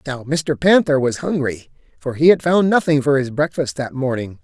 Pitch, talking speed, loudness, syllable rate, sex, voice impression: 140 Hz, 205 wpm, -17 LUFS, 5.0 syllables/s, male, masculine, very adult-like, slightly clear, refreshing, slightly sincere